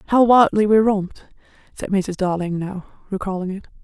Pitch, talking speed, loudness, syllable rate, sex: 195 Hz, 155 wpm, -19 LUFS, 4.9 syllables/s, female